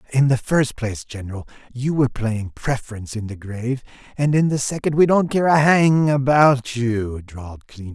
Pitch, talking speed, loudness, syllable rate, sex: 125 Hz, 190 wpm, -19 LUFS, 5.4 syllables/s, male